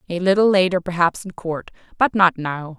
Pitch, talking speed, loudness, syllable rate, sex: 180 Hz, 170 wpm, -19 LUFS, 5.2 syllables/s, female